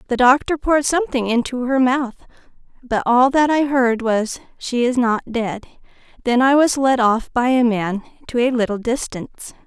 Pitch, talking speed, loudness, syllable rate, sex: 250 Hz, 180 wpm, -18 LUFS, 4.8 syllables/s, female